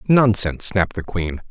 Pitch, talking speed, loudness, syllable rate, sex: 100 Hz, 160 wpm, -19 LUFS, 5.7 syllables/s, male